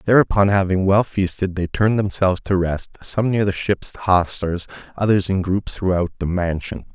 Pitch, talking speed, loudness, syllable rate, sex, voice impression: 95 Hz, 175 wpm, -20 LUFS, 4.9 syllables/s, male, masculine, middle-aged, tensed, powerful, soft, clear, slightly raspy, intellectual, calm, mature, friendly, reassuring, wild, slightly lively, kind